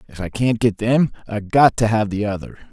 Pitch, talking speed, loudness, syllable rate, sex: 110 Hz, 245 wpm, -18 LUFS, 5.8 syllables/s, male